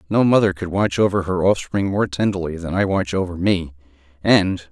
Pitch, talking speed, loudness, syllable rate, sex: 90 Hz, 190 wpm, -19 LUFS, 5.4 syllables/s, male